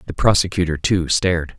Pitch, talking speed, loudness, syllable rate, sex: 85 Hz, 150 wpm, -18 LUFS, 5.6 syllables/s, male